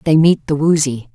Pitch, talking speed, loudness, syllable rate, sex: 150 Hz, 210 wpm, -15 LUFS, 4.7 syllables/s, female